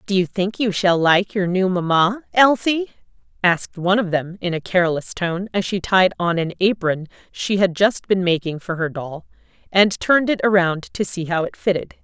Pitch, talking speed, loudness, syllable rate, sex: 185 Hz, 205 wpm, -19 LUFS, 5.0 syllables/s, female